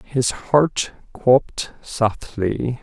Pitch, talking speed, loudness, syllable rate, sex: 125 Hz, 85 wpm, -20 LUFS, 2.4 syllables/s, male